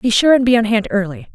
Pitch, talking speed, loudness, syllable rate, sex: 215 Hz, 315 wpm, -14 LUFS, 6.5 syllables/s, female